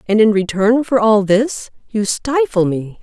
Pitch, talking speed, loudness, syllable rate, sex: 215 Hz, 180 wpm, -15 LUFS, 4.1 syllables/s, female